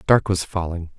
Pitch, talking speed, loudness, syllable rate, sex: 90 Hz, 180 wpm, -22 LUFS, 4.9 syllables/s, male